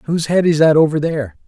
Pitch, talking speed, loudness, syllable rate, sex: 155 Hz, 245 wpm, -15 LUFS, 7.3 syllables/s, male